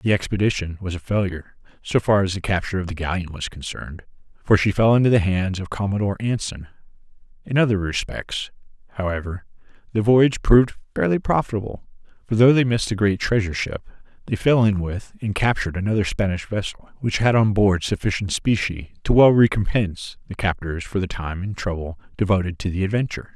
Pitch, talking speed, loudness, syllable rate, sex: 100 Hz, 180 wpm, -21 LUFS, 6.1 syllables/s, male